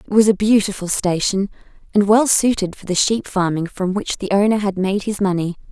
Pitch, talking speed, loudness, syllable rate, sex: 200 Hz, 210 wpm, -18 LUFS, 5.4 syllables/s, female